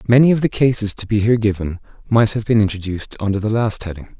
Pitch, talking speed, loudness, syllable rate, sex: 105 Hz, 230 wpm, -18 LUFS, 6.7 syllables/s, male